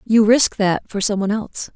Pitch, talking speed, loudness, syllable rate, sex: 210 Hz, 240 wpm, -17 LUFS, 5.5 syllables/s, female